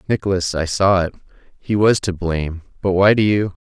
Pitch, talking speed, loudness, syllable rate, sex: 95 Hz, 200 wpm, -18 LUFS, 5.5 syllables/s, male